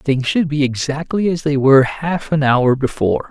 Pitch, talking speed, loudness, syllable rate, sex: 145 Hz, 200 wpm, -16 LUFS, 4.9 syllables/s, male